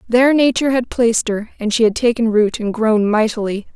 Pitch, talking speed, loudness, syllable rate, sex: 225 Hz, 210 wpm, -16 LUFS, 5.8 syllables/s, female